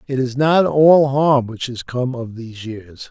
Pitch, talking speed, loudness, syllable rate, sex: 130 Hz, 210 wpm, -16 LUFS, 4.1 syllables/s, male